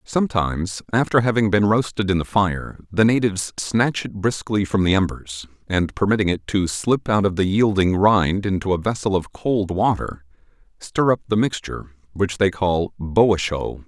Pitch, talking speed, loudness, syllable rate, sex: 100 Hz, 180 wpm, -20 LUFS, 4.8 syllables/s, male